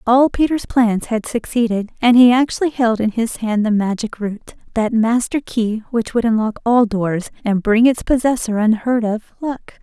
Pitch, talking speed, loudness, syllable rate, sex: 230 Hz, 175 wpm, -17 LUFS, 4.6 syllables/s, female